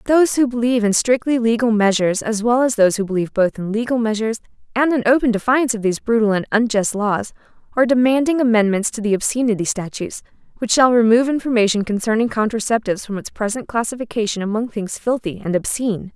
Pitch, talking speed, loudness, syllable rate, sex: 225 Hz, 180 wpm, -18 LUFS, 6.6 syllables/s, female